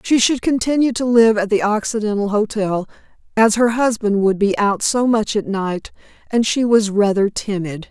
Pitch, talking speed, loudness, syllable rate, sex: 215 Hz, 180 wpm, -17 LUFS, 4.8 syllables/s, female